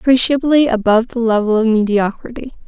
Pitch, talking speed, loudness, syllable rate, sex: 235 Hz, 135 wpm, -14 LUFS, 6.0 syllables/s, female